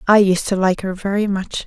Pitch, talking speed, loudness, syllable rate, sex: 195 Hz, 255 wpm, -18 LUFS, 5.3 syllables/s, female